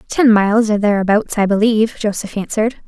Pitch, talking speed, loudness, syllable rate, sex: 215 Hz, 165 wpm, -15 LUFS, 6.3 syllables/s, female